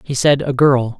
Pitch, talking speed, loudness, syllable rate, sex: 135 Hz, 240 wpm, -15 LUFS, 4.5 syllables/s, male